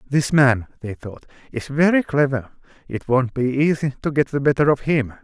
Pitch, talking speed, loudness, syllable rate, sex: 135 Hz, 195 wpm, -19 LUFS, 4.9 syllables/s, male